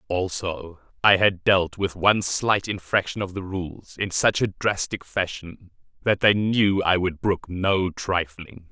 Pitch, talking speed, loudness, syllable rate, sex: 95 Hz, 165 wpm, -23 LUFS, 3.9 syllables/s, male